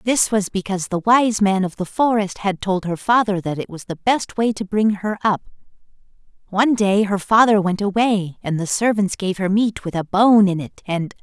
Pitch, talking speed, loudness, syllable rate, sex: 200 Hz, 220 wpm, -19 LUFS, 5.0 syllables/s, male